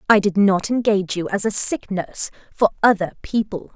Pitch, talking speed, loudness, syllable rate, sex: 200 Hz, 190 wpm, -20 LUFS, 5.4 syllables/s, female